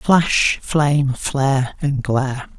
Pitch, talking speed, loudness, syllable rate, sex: 140 Hz, 115 wpm, -18 LUFS, 3.3 syllables/s, male